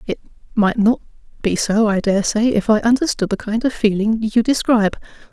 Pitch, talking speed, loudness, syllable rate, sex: 220 Hz, 190 wpm, -17 LUFS, 5.4 syllables/s, female